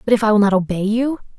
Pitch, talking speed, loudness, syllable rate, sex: 215 Hz, 300 wpm, -17 LUFS, 7.1 syllables/s, female